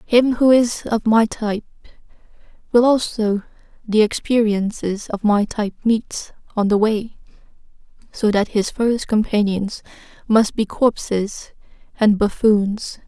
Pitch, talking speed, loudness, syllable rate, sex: 215 Hz, 125 wpm, -19 LUFS, 4.0 syllables/s, female